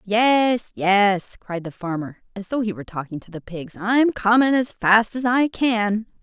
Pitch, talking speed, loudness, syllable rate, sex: 210 Hz, 195 wpm, -20 LUFS, 4.2 syllables/s, female